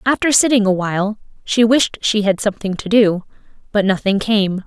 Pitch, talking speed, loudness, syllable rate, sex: 210 Hz, 180 wpm, -16 LUFS, 5.2 syllables/s, female